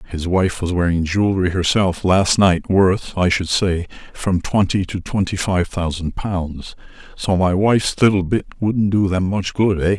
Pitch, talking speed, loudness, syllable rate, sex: 95 Hz, 180 wpm, -18 LUFS, 4.4 syllables/s, male